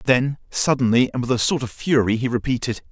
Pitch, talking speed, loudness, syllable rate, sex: 125 Hz, 205 wpm, -20 LUFS, 5.8 syllables/s, male